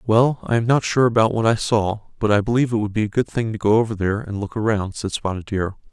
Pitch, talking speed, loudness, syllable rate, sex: 110 Hz, 285 wpm, -20 LUFS, 6.4 syllables/s, male